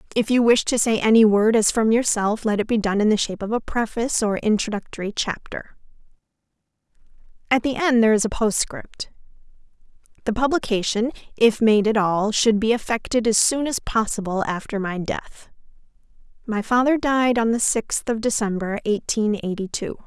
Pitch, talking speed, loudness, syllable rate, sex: 220 Hz, 170 wpm, -21 LUFS, 5.3 syllables/s, female